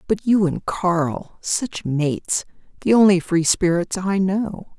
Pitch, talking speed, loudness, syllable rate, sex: 185 Hz, 125 wpm, -20 LUFS, 3.6 syllables/s, female